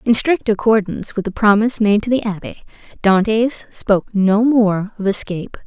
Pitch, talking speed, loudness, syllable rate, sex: 210 Hz, 170 wpm, -16 LUFS, 5.2 syllables/s, female